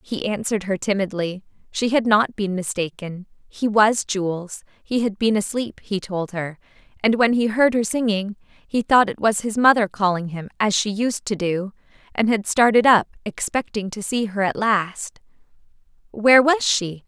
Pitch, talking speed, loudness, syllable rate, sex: 210 Hz, 180 wpm, -20 LUFS, 4.6 syllables/s, female